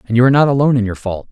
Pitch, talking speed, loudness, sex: 120 Hz, 365 wpm, -14 LUFS, male